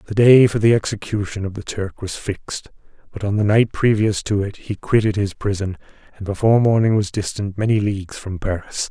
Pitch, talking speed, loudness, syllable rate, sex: 100 Hz, 200 wpm, -19 LUFS, 5.6 syllables/s, male